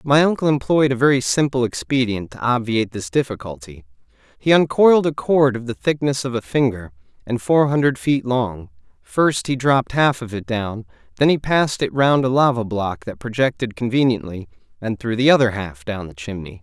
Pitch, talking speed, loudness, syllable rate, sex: 125 Hz, 190 wpm, -19 LUFS, 5.3 syllables/s, male